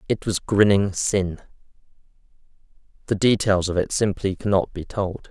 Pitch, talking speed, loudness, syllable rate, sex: 100 Hz, 135 wpm, -22 LUFS, 4.6 syllables/s, male